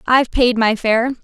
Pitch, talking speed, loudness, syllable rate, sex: 240 Hz, 195 wpm, -15 LUFS, 5.1 syllables/s, female